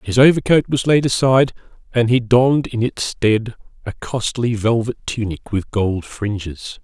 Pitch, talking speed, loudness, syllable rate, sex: 115 Hz, 160 wpm, -18 LUFS, 4.5 syllables/s, male